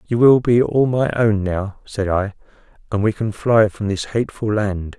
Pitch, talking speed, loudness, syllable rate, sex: 105 Hz, 205 wpm, -18 LUFS, 4.5 syllables/s, male